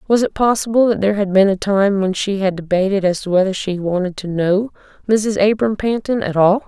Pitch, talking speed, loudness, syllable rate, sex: 200 Hz, 225 wpm, -17 LUFS, 5.5 syllables/s, female